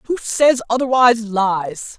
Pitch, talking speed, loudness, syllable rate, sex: 230 Hz, 120 wpm, -16 LUFS, 4.2 syllables/s, female